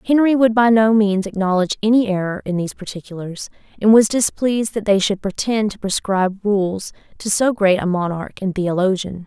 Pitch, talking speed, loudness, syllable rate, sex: 205 Hz, 180 wpm, -18 LUFS, 5.5 syllables/s, female